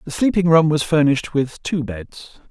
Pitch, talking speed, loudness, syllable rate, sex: 150 Hz, 190 wpm, -18 LUFS, 5.0 syllables/s, male